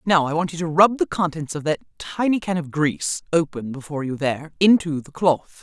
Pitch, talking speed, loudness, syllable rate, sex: 160 Hz, 225 wpm, -21 LUFS, 5.7 syllables/s, female